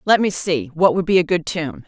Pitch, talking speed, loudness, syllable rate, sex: 175 Hz, 290 wpm, -18 LUFS, 5.2 syllables/s, female